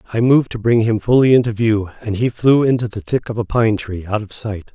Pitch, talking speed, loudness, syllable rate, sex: 110 Hz, 265 wpm, -17 LUFS, 5.9 syllables/s, male